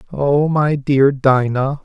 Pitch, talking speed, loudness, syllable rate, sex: 140 Hz, 130 wpm, -15 LUFS, 3.2 syllables/s, male